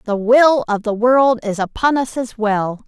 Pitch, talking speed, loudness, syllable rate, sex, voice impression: 230 Hz, 210 wpm, -16 LUFS, 4.2 syllables/s, female, very feminine, slightly young, soft, cute, slightly refreshing, friendly, kind